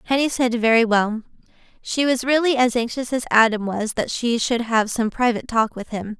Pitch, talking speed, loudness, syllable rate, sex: 235 Hz, 205 wpm, -20 LUFS, 5.3 syllables/s, female